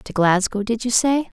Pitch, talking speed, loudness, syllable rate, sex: 225 Hz, 215 wpm, -19 LUFS, 4.6 syllables/s, female